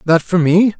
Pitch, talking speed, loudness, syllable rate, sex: 180 Hz, 230 wpm, -13 LUFS, 4.8 syllables/s, male